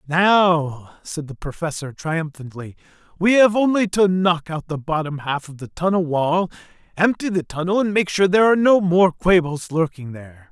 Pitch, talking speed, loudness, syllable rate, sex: 170 Hz, 175 wpm, -19 LUFS, 4.8 syllables/s, male